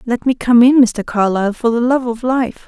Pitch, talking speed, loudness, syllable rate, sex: 240 Hz, 245 wpm, -14 LUFS, 5.2 syllables/s, female